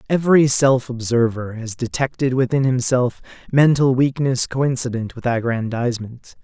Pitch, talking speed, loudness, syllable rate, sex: 125 Hz, 110 wpm, -19 LUFS, 4.7 syllables/s, male